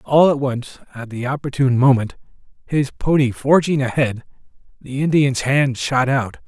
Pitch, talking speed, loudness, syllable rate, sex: 135 Hz, 150 wpm, -18 LUFS, 4.7 syllables/s, male